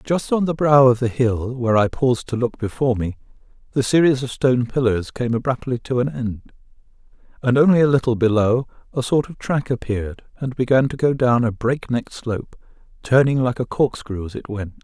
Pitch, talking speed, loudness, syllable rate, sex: 125 Hz, 200 wpm, -20 LUFS, 5.5 syllables/s, male